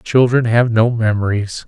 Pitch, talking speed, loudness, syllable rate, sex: 115 Hz, 145 wpm, -15 LUFS, 4.3 syllables/s, male